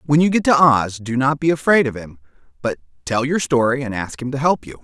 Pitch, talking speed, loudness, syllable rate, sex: 135 Hz, 260 wpm, -18 LUFS, 5.7 syllables/s, male